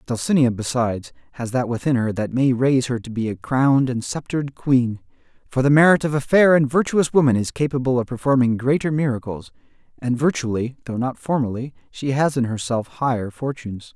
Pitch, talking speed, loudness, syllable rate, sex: 130 Hz, 185 wpm, -20 LUFS, 5.6 syllables/s, male